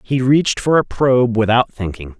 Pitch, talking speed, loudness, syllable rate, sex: 120 Hz, 190 wpm, -16 LUFS, 5.3 syllables/s, male